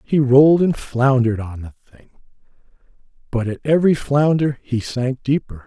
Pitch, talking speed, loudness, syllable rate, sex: 130 Hz, 150 wpm, -17 LUFS, 5.0 syllables/s, male